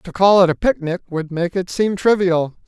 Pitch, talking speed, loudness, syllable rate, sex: 180 Hz, 225 wpm, -17 LUFS, 4.9 syllables/s, male